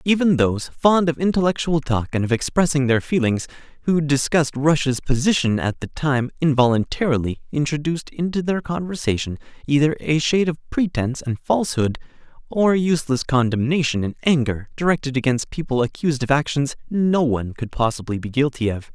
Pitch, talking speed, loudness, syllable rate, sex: 140 Hz, 150 wpm, -20 LUFS, 5.6 syllables/s, male